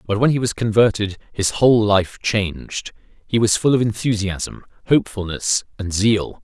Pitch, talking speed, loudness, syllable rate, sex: 105 Hz, 160 wpm, -19 LUFS, 4.8 syllables/s, male